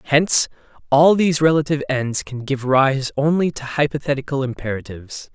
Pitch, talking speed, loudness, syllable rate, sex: 140 Hz, 135 wpm, -19 LUFS, 5.6 syllables/s, male